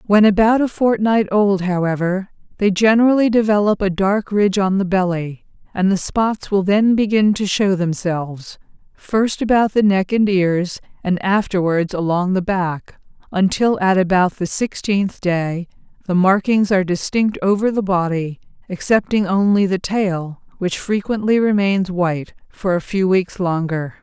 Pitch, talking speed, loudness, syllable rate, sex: 195 Hz, 150 wpm, -17 LUFS, 4.5 syllables/s, female